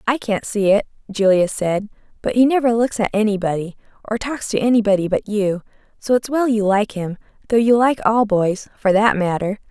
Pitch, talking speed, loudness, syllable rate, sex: 210 Hz, 200 wpm, -18 LUFS, 5.3 syllables/s, female